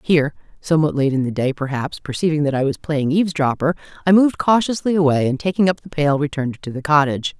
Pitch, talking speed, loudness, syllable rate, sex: 150 Hz, 210 wpm, -19 LUFS, 5.7 syllables/s, female